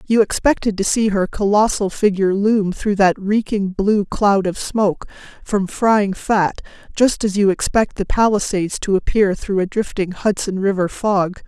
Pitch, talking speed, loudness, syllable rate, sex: 200 Hz, 165 wpm, -18 LUFS, 4.5 syllables/s, female